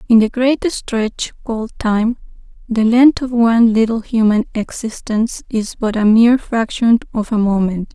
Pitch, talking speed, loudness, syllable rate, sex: 225 Hz, 160 wpm, -15 LUFS, 4.6 syllables/s, female